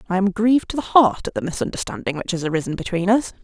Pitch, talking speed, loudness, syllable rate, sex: 190 Hz, 245 wpm, -20 LUFS, 7.0 syllables/s, female